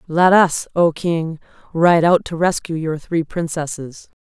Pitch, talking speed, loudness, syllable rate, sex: 165 Hz, 155 wpm, -17 LUFS, 3.9 syllables/s, female